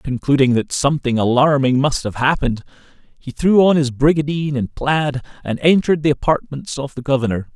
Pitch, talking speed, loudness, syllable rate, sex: 140 Hz, 165 wpm, -17 LUFS, 5.6 syllables/s, male